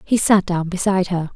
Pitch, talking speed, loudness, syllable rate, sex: 185 Hz, 220 wpm, -18 LUFS, 5.7 syllables/s, female